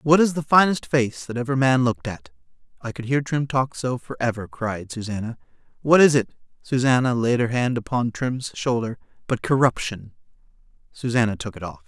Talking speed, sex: 160 wpm, male